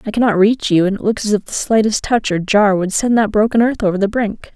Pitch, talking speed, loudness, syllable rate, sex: 210 Hz, 275 wpm, -15 LUFS, 5.9 syllables/s, female